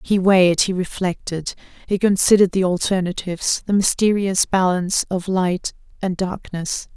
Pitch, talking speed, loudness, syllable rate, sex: 185 Hz, 130 wpm, -19 LUFS, 4.9 syllables/s, female